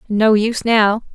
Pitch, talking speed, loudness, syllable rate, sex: 215 Hz, 155 wpm, -15 LUFS, 4.3 syllables/s, female